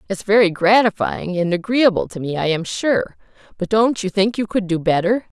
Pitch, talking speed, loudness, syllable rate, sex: 200 Hz, 200 wpm, -18 LUFS, 5.1 syllables/s, female